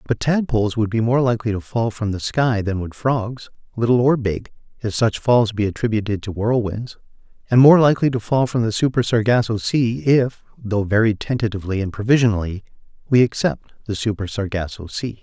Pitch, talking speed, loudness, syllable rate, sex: 115 Hz, 180 wpm, -19 LUFS, 5.5 syllables/s, male